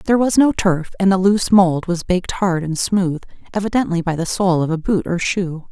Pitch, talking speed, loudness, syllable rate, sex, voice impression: 185 Hz, 230 wpm, -17 LUFS, 5.3 syllables/s, female, feminine, adult-like, tensed, clear, fluent, intellectual, calm, friendly, reassuring, elegant, slightly lively, kind